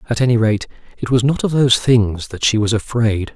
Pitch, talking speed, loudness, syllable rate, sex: 115 Hz, 230 wpm, -16 LUFS, 5.6 syllables/s, male